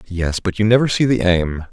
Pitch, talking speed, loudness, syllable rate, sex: 100 Hz, 245 wpm, -17 LUFS, 5.1 syllables/s, male